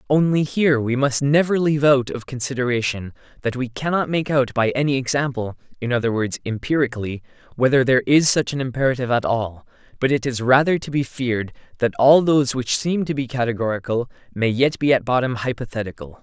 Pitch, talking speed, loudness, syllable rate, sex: 130 Hz, 185 wpm, -20 LUFS, 6.0 syllables/s, male